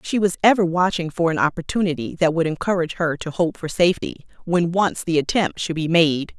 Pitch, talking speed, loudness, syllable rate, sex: 170 Hz, 205 wpm, -20 LUFS, 5.7 syllables/s, female